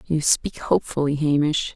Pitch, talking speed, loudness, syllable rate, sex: 150 Hz, 135 wpm, -21 LUFS, 4.9 syllables/s, female